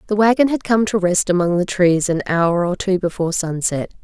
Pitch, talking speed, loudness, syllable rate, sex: 185 Hz, 225 wpm, -17 LUFS, 5.4 syllables/s, female